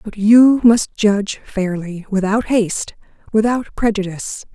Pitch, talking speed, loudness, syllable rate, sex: 210 Hz, 120 wpm, -16 LUFS, 4.4 syllables/s, female